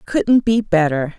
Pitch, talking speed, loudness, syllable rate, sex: 195 Hz, 150 wpm, -16 LUFS, 3.8 syllables/s, female